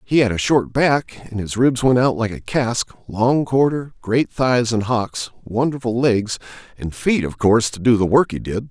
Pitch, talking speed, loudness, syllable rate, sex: 120 Hz, 215 wpm, -19 LUFS, 4.4 syllables/s, male